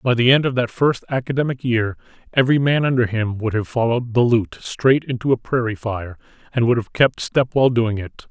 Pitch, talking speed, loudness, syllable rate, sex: 120 Hz, 215 wpm, -19 LUFS, 5.4 syllables/s, male